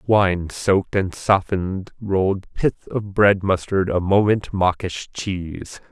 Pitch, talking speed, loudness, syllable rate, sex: 95 Hz, 130 wpm, -21 LUFS, 3.9 syllables/s, male